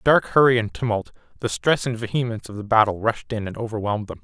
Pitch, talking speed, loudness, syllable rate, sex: 115 Hz, 240 wpm, -22 LUFS, 6.9 syllables/s, male